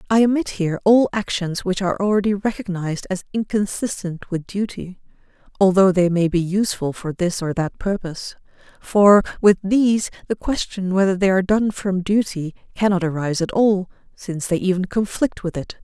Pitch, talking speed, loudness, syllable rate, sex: 190 Hz, 165 wpm, -20 LUFS, 5.4 syllables/s, female